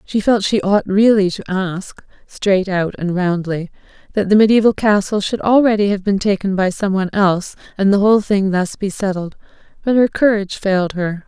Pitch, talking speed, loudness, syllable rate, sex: 195 Hz, 190 wpm, -16 LUFS, 5.2 syllables/s, female